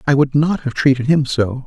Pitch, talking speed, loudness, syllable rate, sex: 140 Hz, 255 wpm, -16 LUFS, 5.2 syllables/s, male